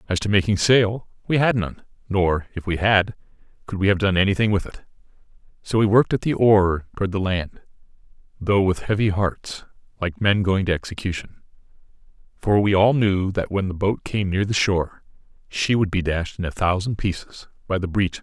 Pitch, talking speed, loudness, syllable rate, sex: 100 Hz, 205 wpm, -21 LUFS, 5.5 syllables/s, male